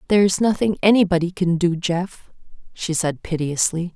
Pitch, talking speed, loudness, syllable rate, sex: 180 Hz, 150 wpm, -20 LUFS, 5.2 syllables/s, female